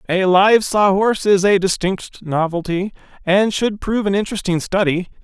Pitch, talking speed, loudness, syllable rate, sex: 190 Hz, 160 wpm, -17 LUFS, 5.0 syllables/s, male